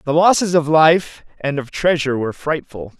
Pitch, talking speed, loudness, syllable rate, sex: 155 Hz, 180 wpm, -17 LUFS, 5.1 syllables/s, male